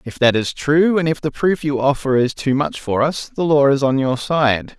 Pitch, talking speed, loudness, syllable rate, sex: 140 Hz, 265 wpm, -17 LUFS, 4.7 syllables/s, male